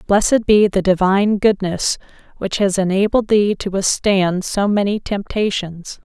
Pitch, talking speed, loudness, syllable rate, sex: 200 Hz, 140 wpm, -17 LUFS, 4.4 syllables/s, female